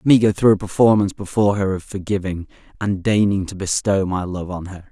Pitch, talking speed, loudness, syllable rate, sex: 100 Hz, 210 wpm, -19 LUFS, 5.8 syllables/s, male